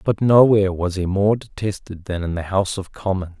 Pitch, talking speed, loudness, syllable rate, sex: 95 Hz, 210 wpm, -19 LUFS, 5.6 syllables/s, male